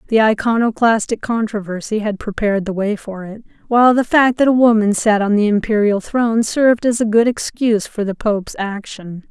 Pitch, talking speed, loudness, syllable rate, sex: 220 Hz, 185 wpm, -16 LUFS, 5.4 syllables/s, female